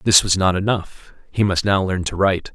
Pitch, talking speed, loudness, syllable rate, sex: 95 Hz, 210 wpm, -18 LUFS, 5.1 syllables/s, male